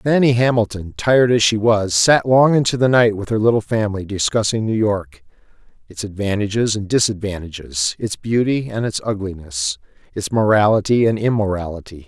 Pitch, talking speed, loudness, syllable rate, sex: 110 Hz, 150 wpm, -17 LUFS, 5.3 syllables/s, male